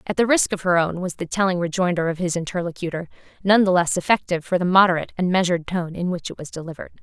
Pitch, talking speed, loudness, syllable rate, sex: 180 Hz, 240 wpm, -21 LUFS, 7.1 syllables/s, female